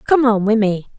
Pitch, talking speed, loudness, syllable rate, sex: 225 Hz, 245 wpm, -16 LUFS, 5.6 syllables/s, female